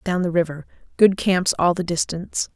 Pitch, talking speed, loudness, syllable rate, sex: 175 Hz, 165 wpm, -20 LUFS, 5.2 syllables/s, female